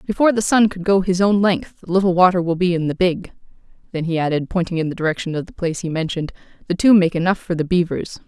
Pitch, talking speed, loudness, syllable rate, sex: 180 Hz, 255 wpm, -18 LUFS, 6.7 syllables/s, female